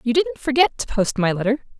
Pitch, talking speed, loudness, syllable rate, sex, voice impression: 235 Hz, 235 wpm, -20 LUFS, 5.8 syllables/s, female, very feminine, very adult-like, very thin, tensed, powerful, slightly bright, hard, clear, fluent, slightly raspy, cool, very intellectual, very refreshing, sincere, slightly calm, slightly friendly, reassuring, very unique, elegant, wild, slightly sweet, lively, strict, intense, sharp, slightly light